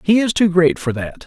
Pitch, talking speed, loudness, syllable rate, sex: 175 Hz, 285 wpm, -16 LUFS, 5.1 syllables/s, male